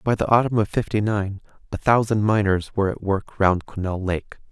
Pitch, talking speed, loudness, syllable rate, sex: 100 Hz, 200 wpm, -22 LUFS, 5.1 syllables/s, male